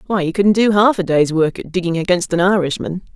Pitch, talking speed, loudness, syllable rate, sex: 180 Hz, 250 wpm, -16 LUFS, 5.8 syllables/s, female